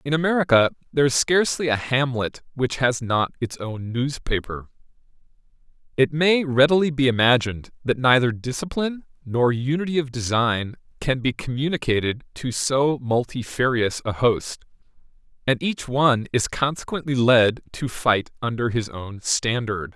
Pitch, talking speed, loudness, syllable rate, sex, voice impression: 130 Hz, 135 wpm, -22 LUFS, 4.8 syllables/s, male, very masculine, adult-like, slightly middle-aged, very thick, very tensed, powerful, bright, hard, slightly muffled, fluent, very cool, intellectual, slightly refreshing, sincere, reassuring, unique, wild, slightly sweet, lively